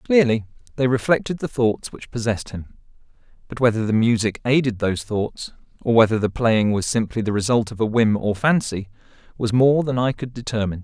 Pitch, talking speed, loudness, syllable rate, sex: 115 Hz, 190 wpm, -21 LUFS, 5.6 syllables/s, male